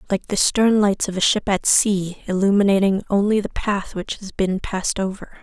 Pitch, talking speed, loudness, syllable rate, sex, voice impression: 195 Hz, 200 wpm, -20 LUFS, 5.0 syllables/s, female, feminine, slightly adult-like, slightly dark, slightly cute, calm, slightly unique, slightly kind